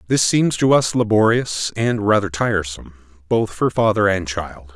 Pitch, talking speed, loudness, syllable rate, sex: 105 Hz, 165 wpm, -18 LUFS, 4.7 syllables/s, male